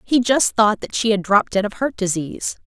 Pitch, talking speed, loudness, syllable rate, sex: 215 Hz, 250 wpm, -19 LUFS, 5.6 syllables/s, female